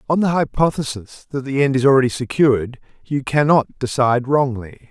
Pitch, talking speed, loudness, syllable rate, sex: 135 Hz, 160 wpm, -18 LUFS, 5.5 syllables/s, male